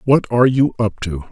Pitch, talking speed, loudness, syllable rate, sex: 115 Hz, 230 wpm, -16 LUFS, 5.6 syllables/s, male